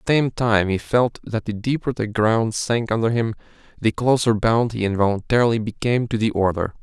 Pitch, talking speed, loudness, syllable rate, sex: 115 Hz, 200 wpm, -21 LUFS, 5.5 syllables/s, male